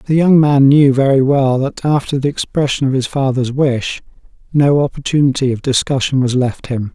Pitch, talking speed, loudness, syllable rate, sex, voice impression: 135 Hz, 180 wpm, -14 LUFS, 5.0 syllables/s, male, masculine, old, slightly thick, sincere, calm, reassuring, slightly kind